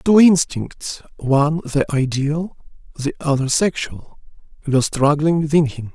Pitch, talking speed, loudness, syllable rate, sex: 145 Hz, 100 wpm, -18 LUFS, 4.3 syllables/s, male